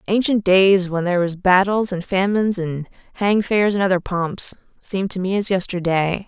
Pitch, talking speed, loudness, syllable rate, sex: 190 Hz, 180 wpm, -19 LUFS, 4.8 syllables/s, female